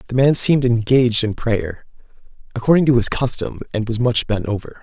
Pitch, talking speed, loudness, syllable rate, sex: 120 Hz, 185 wpm, -18 LUFS, 5.8 syllables/s, male